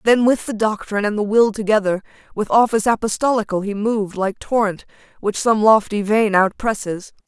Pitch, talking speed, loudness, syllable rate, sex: 210 Hz, 175 wpm, -18 LUFS, 5.5 syllables/s, female